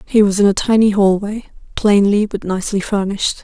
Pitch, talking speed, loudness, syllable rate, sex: 205 Hz, 175 wpm, -15 LUFS, 5.6 syllables/s, female